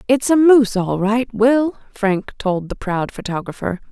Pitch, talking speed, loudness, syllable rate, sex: 220 Hz, 170 wpm, -18 LUFS, 4.3 syllables/s, female